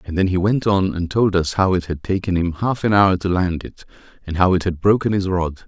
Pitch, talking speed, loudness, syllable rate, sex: 95 Hz, 275 wpm, -19 LUFS, 5.5 syllables/s, male